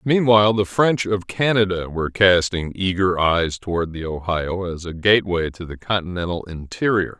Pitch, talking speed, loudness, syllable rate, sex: 95 Hz, 160 wpm, -20 LUFS, 5.0 syllables/s, male